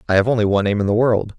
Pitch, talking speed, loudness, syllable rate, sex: 105 Hz, 345 wpm, -17 LUFS, 8.3 syllables/s, male